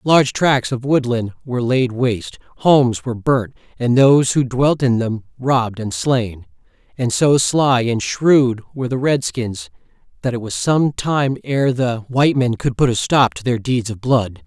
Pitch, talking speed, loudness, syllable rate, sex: 125 Hz, 195 wpm, -17 LUFS, 4.5 syllables/s, male